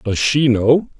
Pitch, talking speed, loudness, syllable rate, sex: 125 Hz, 180 wpm, -15 LUFS, 3.8 syllables/s, male